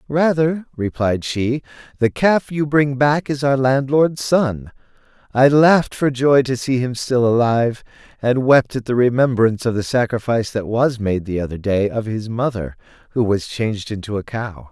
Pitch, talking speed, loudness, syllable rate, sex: 125 Hz, 180 wpm, -18 LUFS, 4.7 syllables/s, male